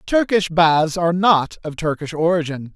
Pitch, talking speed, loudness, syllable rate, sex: 165 Hz, 150 wpm, -18 LUFS, 4.6 syllables/s, male